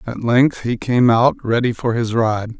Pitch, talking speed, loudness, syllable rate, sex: 120 Hz, 210 wpm, -17 LUFS, 4.1 syllables/s, male